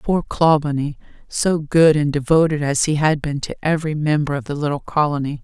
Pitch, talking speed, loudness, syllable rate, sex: 150 Hz, 190 wpm, -19 LUFS, 5.4 syllables/s, female